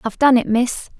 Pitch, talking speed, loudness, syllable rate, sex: 240 Hz, 240 wpm, -17 LUFS, 6.0 syllables/s, female